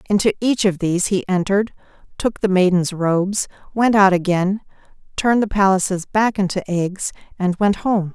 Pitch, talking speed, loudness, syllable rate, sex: 195 Hz, 160 wpm, -18 LUFS, 5.2 syllables/s, female